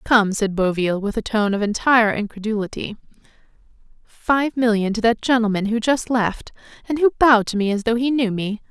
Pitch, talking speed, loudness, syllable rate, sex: 225 Hz, 185 wpm, -19 LUFS, 5.5 syllables/s, female